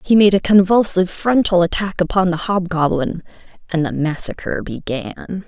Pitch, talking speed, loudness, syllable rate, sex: 180 Hz, 130 wpm, -17 LUFS, 5.0 syllables/s, female